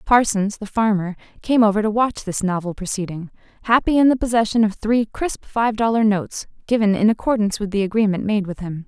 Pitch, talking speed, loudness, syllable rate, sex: 210 Hz, 195 wpm, -19 LUFS, 5.8 syllables/s, female